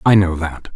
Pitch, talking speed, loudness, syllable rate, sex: 90 Hz, 240 wpm, -18 LUFS, 4.7 syllables/s, male